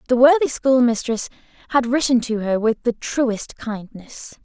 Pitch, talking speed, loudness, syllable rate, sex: 240 Hz, 150 wpm, -19 LUFS, 4.3 syllables/s, female